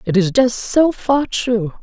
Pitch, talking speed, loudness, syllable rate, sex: 250 Hz, 195 wpm, -16 LUFS, 3.6 syllables/s, female